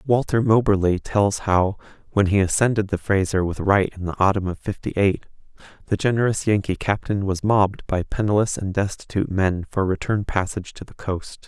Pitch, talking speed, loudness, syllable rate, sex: 100 Hz, 180 wpm, -22 LUFS, 5.3 syllables/s, male